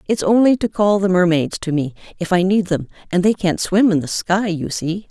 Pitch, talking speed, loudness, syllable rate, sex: 185 Hz, 245 wpm, -17 LUFS, 5.2 syllables/s, female